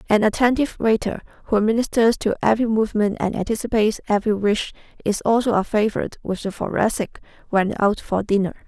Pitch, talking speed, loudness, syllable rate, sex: 215 Hz, 160 wpm, -21 LUFS, 6.3 syllables/s, female